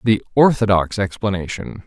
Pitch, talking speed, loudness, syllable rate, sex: 105 Hz, 95 wpm, -18 LUFS, 4.9 syllables/s, male